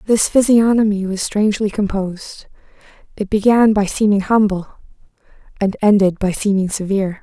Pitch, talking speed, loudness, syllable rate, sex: 205 Hz, 125 wpm, -16 LUFS, 5.3 syllables/s, female